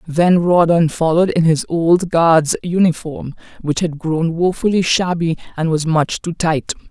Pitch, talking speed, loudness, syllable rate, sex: 165 Hz, 155 wpm, -16 LUFS, 4.3 syllables/s, female